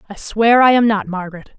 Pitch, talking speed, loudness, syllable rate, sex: 210 Hz, 225 wpm, -14 LUFS, 6.1 syllables/s, female